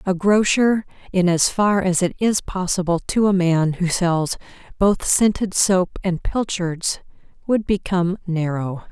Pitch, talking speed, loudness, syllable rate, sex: 185 Hz, 150 wpm, -19 LUFS, 4.0 syllables/s, female